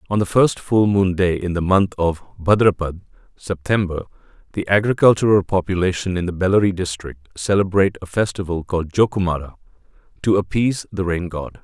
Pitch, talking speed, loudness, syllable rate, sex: 95 Hz, 150 wpm, -19 LUFS, 5.8 syllables/s, male